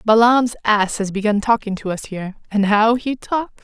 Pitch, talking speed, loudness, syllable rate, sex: 220 Hz, 180 wpm, -18 LUFS, 4.9 syllables/s, female